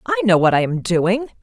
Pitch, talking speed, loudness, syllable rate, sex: 210 Hz, 250 wpm, -17 LUFS, 5.1 syllables/s, female